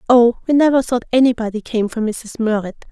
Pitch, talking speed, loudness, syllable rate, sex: 235 Hz, 185 wpm, -17 LUFS, 5.6 syllables/s, female